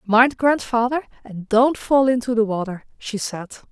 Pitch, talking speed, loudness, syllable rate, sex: 235 Hz, 160 wpm, -20 LUFS, 4.5 syllables/s, female